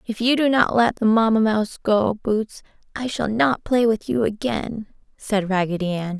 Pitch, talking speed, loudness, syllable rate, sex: 220 Hz, 195 wpm, -21 LUFS, 4.7 syllables/s, female